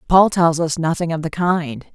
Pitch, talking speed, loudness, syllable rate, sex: 165 Hz, 215 wpm, -18 LUFS, 4.7 syllables/s, female